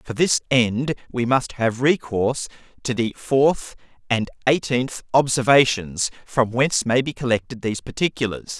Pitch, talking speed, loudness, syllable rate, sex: 125 Hz, 145 wpm, -21 LUFS, 4.8 syllables/s, male